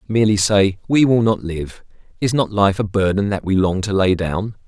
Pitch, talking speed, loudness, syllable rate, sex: 100 Hz, 220 wpm, -18 LUFS, 5.1 syllables/s, male